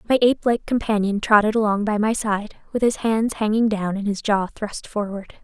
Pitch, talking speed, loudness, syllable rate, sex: 215 Hz, 210 wpm, -21 LUFS, 5.2 syllables/s, female